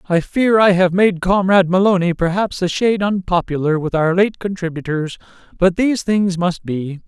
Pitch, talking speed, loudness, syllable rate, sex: 185 Hz, 170 wpm, -16 LUFS, 5.1 syllables/s, male